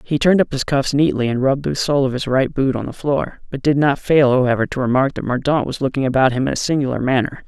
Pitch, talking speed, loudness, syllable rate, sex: 135 Hz, 275 wpm, -18 LUFS, 6.3 syllables/s, male